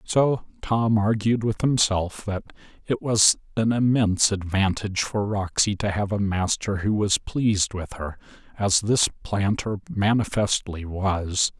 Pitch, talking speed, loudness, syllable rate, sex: 105 Hz, 140 wpm, -23 LUFS, 4.1 syllables/s, male